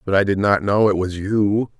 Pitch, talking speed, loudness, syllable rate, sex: 100 Hz, 270 wpm, -18 LUFS, 4.9 syllables/s, male